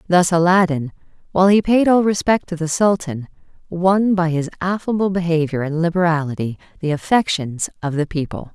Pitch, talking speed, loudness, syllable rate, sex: 170 Hz, 155 wpm, -18 LUFS, 5.4 syllables/s, female